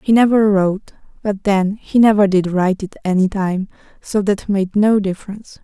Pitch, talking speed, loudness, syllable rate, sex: 200 Hz, 180 wpm, -16 LUFS, 5.2 syllables/s, female